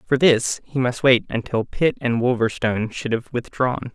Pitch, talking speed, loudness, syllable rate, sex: 125 Hz, 185 wpm, -21 LUFS, 4.7 syllables/s, male